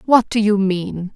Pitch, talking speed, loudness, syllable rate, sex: 205 Hz, 210 wpm, -17 LUFS, 4.0 syllables/s, female